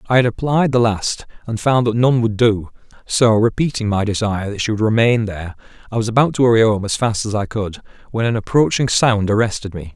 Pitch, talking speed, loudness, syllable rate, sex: 110 Hz, 225 wpm, -17 LUFS, 5.8 syllables/s, male